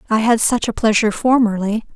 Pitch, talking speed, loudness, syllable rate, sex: 220 Hz, 185 wpm, -16 LUFS, 6.0 syllables/s, female